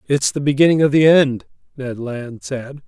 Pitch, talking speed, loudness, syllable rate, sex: 135 Hz, 190 wpm, -16 LUFS, 4.7 syllables/s, male